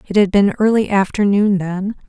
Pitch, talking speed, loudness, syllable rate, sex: 200 Hz, 175 wpm, -16 LUFS, 5.0 syllables/s, female